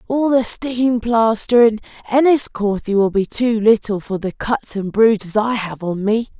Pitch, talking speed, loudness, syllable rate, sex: 220 Hz, 180 wpm, -17 LUFS, 4.5 syllables/s, female